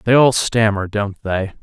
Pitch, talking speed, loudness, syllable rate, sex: 105 Hz, 185 wpm, -17 LUFS, 4.2 syllables/s, male